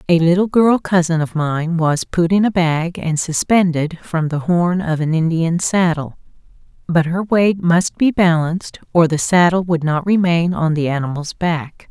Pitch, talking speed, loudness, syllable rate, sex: 170 Hz, 180 wpm, -16 LUFS, 4.4 syllables/s, female